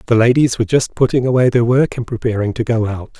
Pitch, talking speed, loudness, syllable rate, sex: 120 Hz, 245 wpm, -15 LUFS, 6.3 syllables/s, male